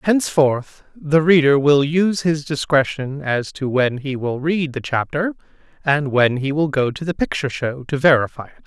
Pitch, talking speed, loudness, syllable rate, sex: 145 Hz, 185 wpm, -19 LUFS, 4.8 syllables/s, male